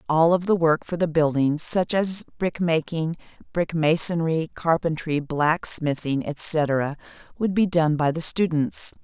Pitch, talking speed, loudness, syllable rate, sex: 160 Hz, 140 wpm, -22 LUFS, 3.9 syllables/s, female